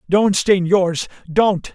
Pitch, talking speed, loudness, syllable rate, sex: 185 Hz, 105 wpm, -17 LUFS, 2.9 syllables/s, male